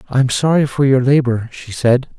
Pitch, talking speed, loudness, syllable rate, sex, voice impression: 130 Hz, 220 wpm, -15 LUFS, 5.2 syllables/s, male, very masculine, very adult-like, very middle-aged, very thick, tensed, powerful, slightly dark, soft, slightly muffled, fluent, slightly raspy, cool, intellectual, slightly refreshing, very sincere, very calm, very mature, friendly, very reassuring, very unique, slightly elegant, wild, sweet, slightly lively, kind, slightly modest